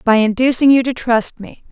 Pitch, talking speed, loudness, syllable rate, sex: 240 Hz, 210 wpm, -14 LUFS, 5.1 syllables/s, female